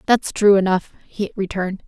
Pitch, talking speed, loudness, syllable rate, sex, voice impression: 195 Hz, 160 wpm, -19 LUFS, 5.1 syllables/s, female, feminine, slightly adult-like, slightly fluent, intellectual, calm